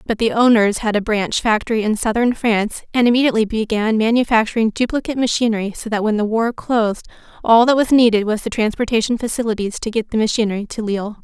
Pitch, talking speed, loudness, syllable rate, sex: 220 Hz, 190 wpm, -17 LUFS, 6.5 syllables/s, female